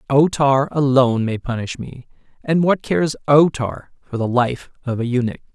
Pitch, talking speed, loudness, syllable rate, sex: 135 Hz, 185 wpm, -18 LUFS, 4.9 syllables/s, male